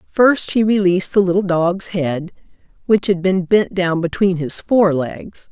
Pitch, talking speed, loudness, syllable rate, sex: 185 Hz, 175 wpm, -17 LUFS, 4.1 syllables/s, female